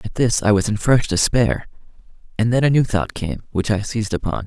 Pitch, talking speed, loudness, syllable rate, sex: 110 Hz, 230 wpm, -19 LUFS, 5.6 syllables/s, male